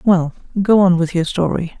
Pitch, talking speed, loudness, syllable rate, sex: 180 Hz, 200 wpm, -16 LUFS, 5.0 syllables/s, female